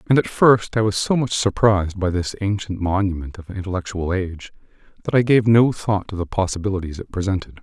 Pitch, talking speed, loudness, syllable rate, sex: 100 Hz, 205 wpm, -20 LUFS, 5.9 syllables/s, male